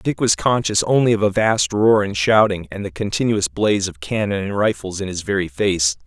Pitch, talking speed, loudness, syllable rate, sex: 100 Hz, 220 wpm, -18 LUFS, 5.3 syllables/s, male